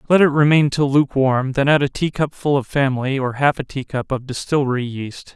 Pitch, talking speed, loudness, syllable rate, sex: 135 Hz, 235 wpm, -18 LUFS, 5.6 syllables/s, male